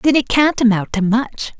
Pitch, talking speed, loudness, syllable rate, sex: 240 Hz, 225 wpm, -16 LUFS, 4.7 syllables/s, female